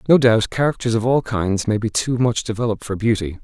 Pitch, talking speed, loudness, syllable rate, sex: 115 Hz, 225 wpm, -19 LUFS, 5.9 syllables/s, male